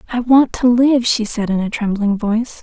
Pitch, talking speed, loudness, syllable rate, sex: 230 Hz, 230 wpm, -15 LUFS, 5.1 syllables/s, female